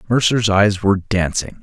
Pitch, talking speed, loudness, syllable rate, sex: 100 Hz, 150 wpm, -16 LUFS, 4.9 syllables/s, male